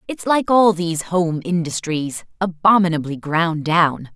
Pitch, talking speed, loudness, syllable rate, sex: 175 Hz, 130 wpm, -18 LUFS, 4.2 syllables/s, female